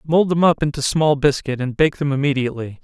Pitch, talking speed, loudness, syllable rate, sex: 145 Hz, 210 wpm, -18 LUFS, 5.9 syllables/s, male